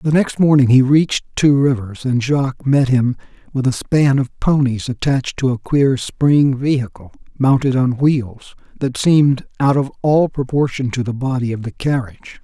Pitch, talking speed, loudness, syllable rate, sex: 135 Hz, 180 wpm, -16 LUFS, 4.8 syllables/s, male